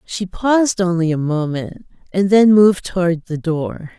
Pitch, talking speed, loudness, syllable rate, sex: 180 Hz, 165 wpm, -16 LUFS, 4.5 syllables/s, female